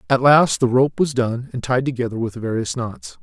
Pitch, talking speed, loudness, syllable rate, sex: 125 Hz, 225 wpm, -19 LUFS, 5.1 syllables/s, male